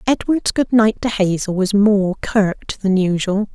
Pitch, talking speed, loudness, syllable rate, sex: 205 Hz, 170 wpm, -17 LUFS, 4.0 syllables/s, female